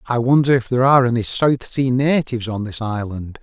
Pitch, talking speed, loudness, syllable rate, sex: 120 Hz, 210 wpm, -18 LUFS, 5.7 syllables/s, male